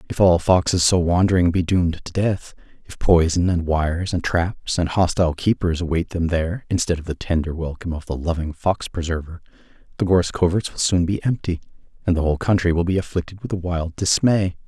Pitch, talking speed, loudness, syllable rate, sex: 85 Hz, 200 wpm, -21 LUFS, 5.8 syllables/s, male